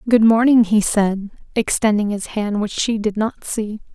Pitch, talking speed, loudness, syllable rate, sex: 215 Hz, 185 wpm, -18 LUFS, 4.4 syllables/s, female